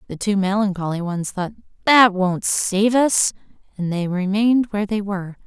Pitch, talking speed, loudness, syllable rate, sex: 200 Hz, 165 wpm, -19 LUFS, 5.0 syllables/s, female